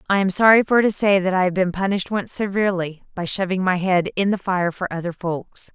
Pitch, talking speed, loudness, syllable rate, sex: 190 Hz, 240 wpm, -20 LUFS, 5.8 syllables/s, female